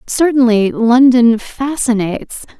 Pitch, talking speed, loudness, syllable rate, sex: 245 Hz, 70 wpm, -12 LUFS, 3.8 syllables/s, female